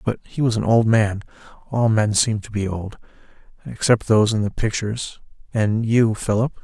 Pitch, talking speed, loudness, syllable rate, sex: 110 Hz, 170 wpm, -20 LUFS, 5.1 syllables/s, male